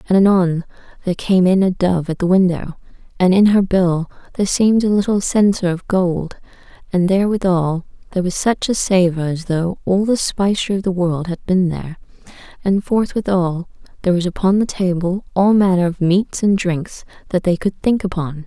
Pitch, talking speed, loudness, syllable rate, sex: 185 Hz, 185 wpm, -17 LUFS, 5.5 syllables/s, female